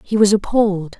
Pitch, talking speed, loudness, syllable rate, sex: 200 Hz, 180 wpm, -16 LUFS, 5.6 syllables/s, female